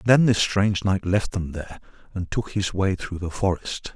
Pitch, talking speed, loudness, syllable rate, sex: 95 Hz, 225 wpm, -24 LUFS, 5.2 syllables/s, male